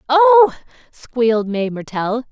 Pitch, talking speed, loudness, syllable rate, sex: 265 Hz, 105 wpm, -15 LUFS, 4.1 syllables/s, female